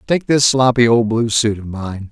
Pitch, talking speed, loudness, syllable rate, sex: 115 Hz, 225 wpm, -15 LUFS, 5.1 syllables/s, male